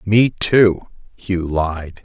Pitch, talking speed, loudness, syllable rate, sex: 95 Hz, 120 wpm, -17 LUFS, 2.4 syllables/s, male